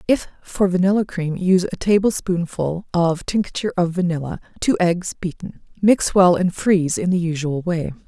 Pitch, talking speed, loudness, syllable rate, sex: 180 Hz, 170 wpm, -19 LUFS, 5.0 syllables/s, female